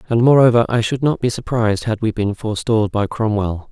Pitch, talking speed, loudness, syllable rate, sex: 115 Hz, 210 wpm, -17 LUFS, 6.0 syllables/s, male